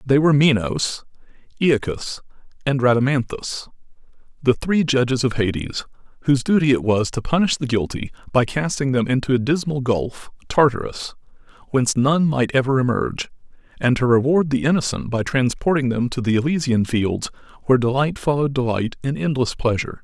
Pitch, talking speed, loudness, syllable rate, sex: 130 Hz, 155 wpm, -20 LUFS, 5.6 syllables/s, male